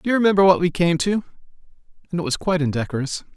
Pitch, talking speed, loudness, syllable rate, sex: 170 Hz, 215 wpm, -20 LUFS, 7.7 syllables/s, male